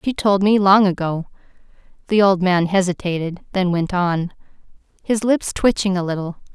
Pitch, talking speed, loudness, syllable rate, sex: 190 Hz, 155 wpm, -18 LUFS, 4.8 syllables/s, female